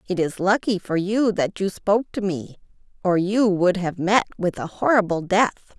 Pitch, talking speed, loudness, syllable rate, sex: 195 Hz, 195 wpm, -22 LUFS, 4.7 syllables/s, female